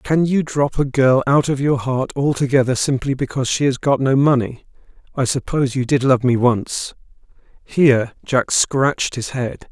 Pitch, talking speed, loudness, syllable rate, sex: 135 Hz, 180 wpm, -18 LUFS, 4.8 syllables/s, male